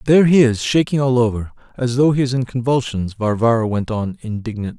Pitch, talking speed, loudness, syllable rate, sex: 120 Hz, 200 wpm, -18 LUFS, 6.0 syllables/s, male